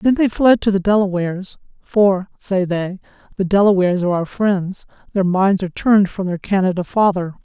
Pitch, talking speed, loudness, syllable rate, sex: 190 Hz, 170 wpm, -17 LUFS, 5.4 syllables/s, female